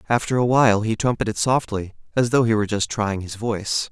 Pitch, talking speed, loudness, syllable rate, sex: 110 Hz, 215 wpm, -21 LUFS, 6.0 syllables/s, male